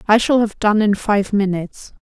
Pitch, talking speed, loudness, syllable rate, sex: 210 Hz, 210 wpm, -17 LUFS, 5.0 syllables/s, female